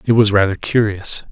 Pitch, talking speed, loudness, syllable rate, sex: 105 Hz, 180 wpm, -16 LUFS, 5.1 syllables/s, male